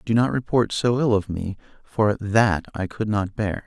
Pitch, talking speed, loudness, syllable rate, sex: 105 Hz, 215 wpm, -22 LUFS, 4.4 syllables/s, male